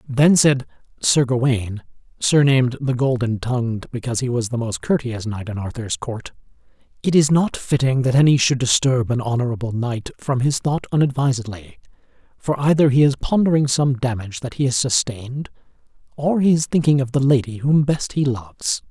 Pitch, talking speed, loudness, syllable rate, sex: 130 Hz, 175 wpm, -19 LUFS, 5.3 syllables/s, male